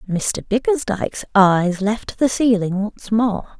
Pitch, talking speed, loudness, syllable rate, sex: 215 Hz, 135 wpm, -19 LUFS, 3.7 syllables/s, female